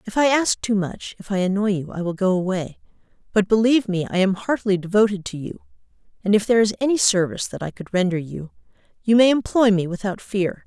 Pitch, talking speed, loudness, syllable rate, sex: 200 Hz, 210 wpm, -20 LUFS, 6.1 syllables/s, female